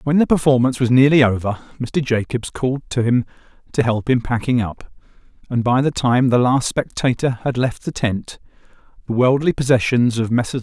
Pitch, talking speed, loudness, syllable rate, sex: 125 Hz, 180 wpm, -18 LUFS, 5.2 syllables/s, male